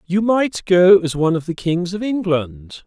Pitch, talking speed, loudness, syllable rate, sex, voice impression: 180 Hz, 210 wpm, -17 LUFS, 4.4 syllables/s, male, masculine, middle-aged, slightly thick, tensed, powerful, slightly bright, clear, halting, cool, intellectual, mature, friendly, reassuring, wild, lively, intense